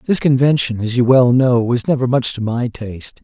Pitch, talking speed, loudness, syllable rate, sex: 125 Hz, 220 wpm, -15 LUFS, 5.2 syllables/s, male